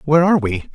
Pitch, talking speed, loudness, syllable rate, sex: 145 Hz, 240 wpm, -16 LUFS, 8.2 syllables/s, male